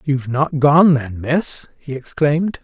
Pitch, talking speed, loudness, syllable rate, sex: 145 Hz, 160 wpm, -16 LUFS, 4.1 syllables/s, male